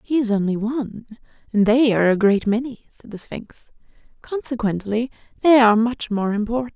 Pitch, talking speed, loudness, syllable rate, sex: 230 Hz, 170 wpm, -20 LUFS, 5.4 syllables/s, female